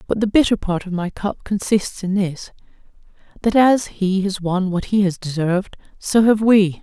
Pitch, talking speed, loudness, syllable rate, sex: 195 Hz, 185 wpm, -19 LUFS, 4.7 syllables/s, female